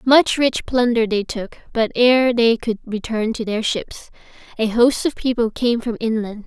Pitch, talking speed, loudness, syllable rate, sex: 230 Hz, 185 wpm, -19 LUFS, 4.3 syllables/s, female